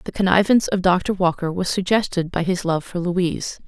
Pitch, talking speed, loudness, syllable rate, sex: 180 Hz, 195 wpm, -20 LUFS, 5.8 syllables/s, female